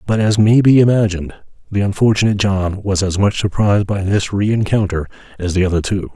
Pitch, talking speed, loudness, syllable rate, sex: 100 Hz, 185 wpm, -15 LUFS, 5.7 syllables/s, male